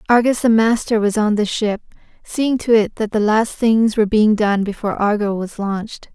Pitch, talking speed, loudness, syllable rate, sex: 215 Hz, 205 wpm, -17 LUFS, 5.1 syllables/s, female